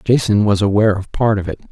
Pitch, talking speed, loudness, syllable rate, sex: 105 Hz, 245 wpm, -16 LUFS, 6.6 syllables/s, male